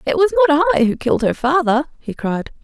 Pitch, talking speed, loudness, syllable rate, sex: 260 Hz, 230 wpm, -16 LUFS, 5.8 syllables/s, female